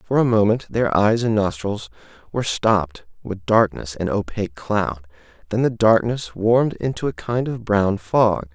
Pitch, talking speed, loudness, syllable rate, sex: 105 Hz, 170 wpm, -20 LUFS, 4.7 syllables/s, male